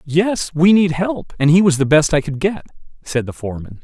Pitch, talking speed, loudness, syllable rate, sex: 160 Hz, 235 wpm, -16 LUFS, 5.2 syllables/s, male